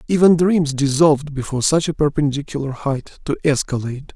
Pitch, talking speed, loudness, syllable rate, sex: 145 Hz, 145 wpm, -18 LUFS, 5.7 syllables/s, male